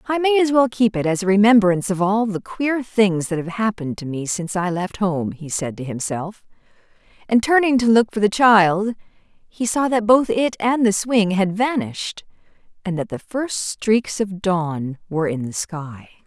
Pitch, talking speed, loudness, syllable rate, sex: 200 Hz, 205 wpm, -19 LUFS, 4.6 syllables/s, female